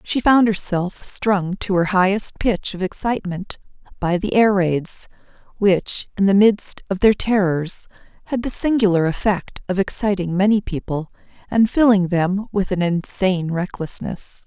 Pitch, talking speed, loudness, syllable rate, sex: 195 Hz, 150 wpm, -19 LUFS, 4.4 syllables/s, female